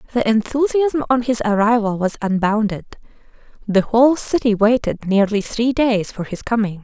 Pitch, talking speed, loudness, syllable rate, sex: 225 Hz, 150 wpm, -18 LUFS, 5.0 syllables/s, female